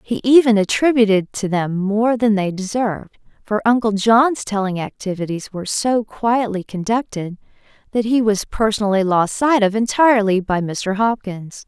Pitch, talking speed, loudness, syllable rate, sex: 215 Hz, 150 wpm, -18 LUFS, 4.8 syllables/s, female